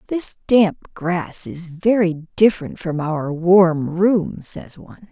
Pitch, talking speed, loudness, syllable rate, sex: 175 Hz, 140 wpm, -18 LUFS, 3.5 syllables/s, female